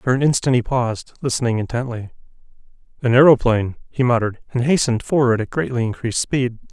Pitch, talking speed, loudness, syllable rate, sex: 125 Hz, 160 wpm, -19 LUFS, 6.5 syllables/s, male